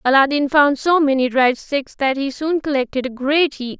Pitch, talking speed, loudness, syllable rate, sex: 275 Hz, 205 wpm, -17 LUFS, 4.8 syllables/s, female